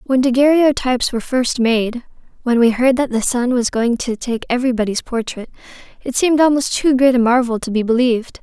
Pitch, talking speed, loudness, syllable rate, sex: 245 Hz, 190 wpm, -16 LUFS, 5.7 syllables/s, female